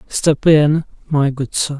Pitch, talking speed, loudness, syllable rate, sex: 145 Hz, 170 wpm, -16 LUFS, 3.5 syllables/s, male